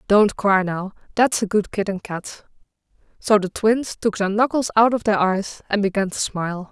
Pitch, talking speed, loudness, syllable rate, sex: 205 Hz, 205 wpm, -20 LUFS, 4.7 syllables/s, female